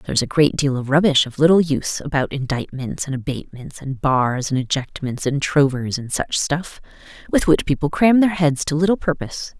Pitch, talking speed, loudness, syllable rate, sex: 145 Hz, 200 wpm, -19 LUFS, 5.5 syllables/s, female